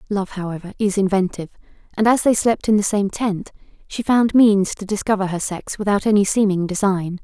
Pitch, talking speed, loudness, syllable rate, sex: 200 Hz, 190 wpm, -19 LUFS, 5.6 syllables/s, female